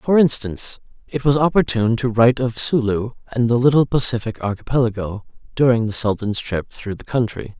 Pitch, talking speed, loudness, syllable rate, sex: 120 Hz, 165 wpm, -19 LUFS, 5.6 syllables/s, male